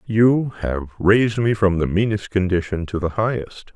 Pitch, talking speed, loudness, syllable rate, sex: 100 Hz, 175 wpm, -20 LUFS, 4.6 syllables/s, male